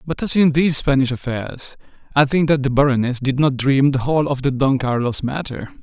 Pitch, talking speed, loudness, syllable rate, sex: 140 Hz, 205 wpm, -18 LUFS, 5.5 syllables/s, male